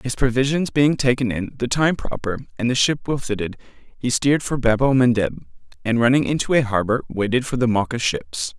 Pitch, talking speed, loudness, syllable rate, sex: 125 Hz, 195 wpm, -20 LUFS, 5.6 syllables/s, male